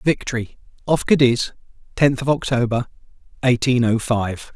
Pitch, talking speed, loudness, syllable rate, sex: 125 Hz, 120 wpm, -19 LUFS, 4.7 syllables/s, male